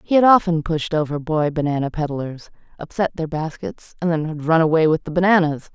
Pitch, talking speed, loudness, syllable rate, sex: 160 Hz, 200 wpm, -19 LUFS, 5.5 syllables/s, female